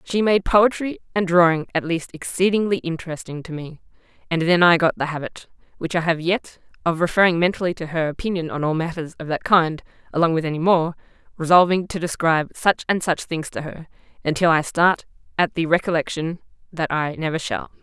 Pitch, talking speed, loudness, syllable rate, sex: 170 Hz, 190 wpm, -21 LUFS, 5.7 syllables/s, female